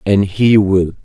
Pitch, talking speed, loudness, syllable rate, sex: 100 Hz, 175 wpm, -13 LUFS, 3.6 syllables/s, male